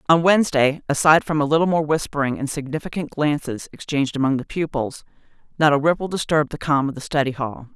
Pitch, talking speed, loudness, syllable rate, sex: 145 Hz, 195 wpm, -21 LUFS, 6.4 syllables/s, female